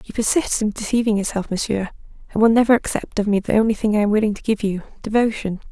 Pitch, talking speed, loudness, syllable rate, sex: 215 Hz, 220 wpm, -20 LUFS, 6.7 syllables/s, female